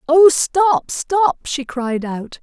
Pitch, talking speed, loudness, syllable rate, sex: 285 Hz, 150 wpm, -17 LUFS, 2.7 syllables/s, female